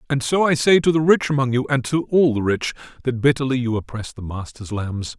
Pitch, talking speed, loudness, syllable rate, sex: 130 Hz, 245 wpm, -20 LUFS, 5.6 syllables/s, male